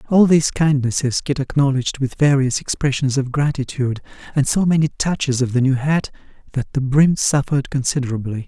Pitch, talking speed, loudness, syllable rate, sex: 140 Hz, 165 wpm, -18 LUFS, 5.7 syllables/s, male